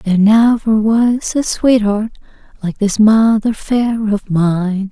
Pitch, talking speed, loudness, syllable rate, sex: 215 Hz, 135 wpm, -13 LUFS, 3.4 syllables/s, female